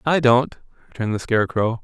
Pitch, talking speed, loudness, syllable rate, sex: 120 Hz, 165 wpm, -20 LUFS, 6.2 syllables/s, male